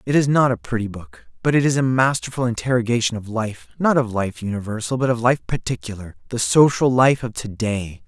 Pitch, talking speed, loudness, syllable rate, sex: 120 Hz, 200 wpm, -20 LUFS, 5.6 syllables/s, male